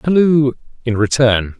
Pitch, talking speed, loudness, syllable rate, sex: 130 Hz, 115 wpm, -15 LUFS, 4.3 syllables/s, male